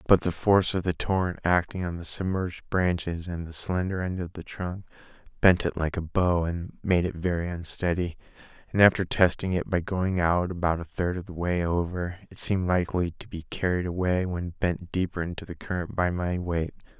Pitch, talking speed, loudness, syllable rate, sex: 90 Hz, 205 wpm, -27 LUFS, 5.2 syllables/s, male